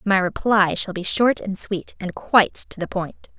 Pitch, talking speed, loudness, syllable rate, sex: 195 Hz, 215 wpm, -21 LUFS, 4.4 syllables/s, female